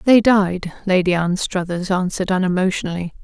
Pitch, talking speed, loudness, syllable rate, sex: 185 Hz, 110 wpm, -19 LUFS, 5.5 syllables/s, female